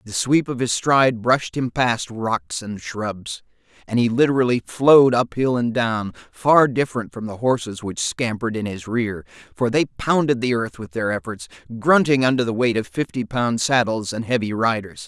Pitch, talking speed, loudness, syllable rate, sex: 115 Hz, 185 wpm, -20 LUFS, 4.9 syllables/s, male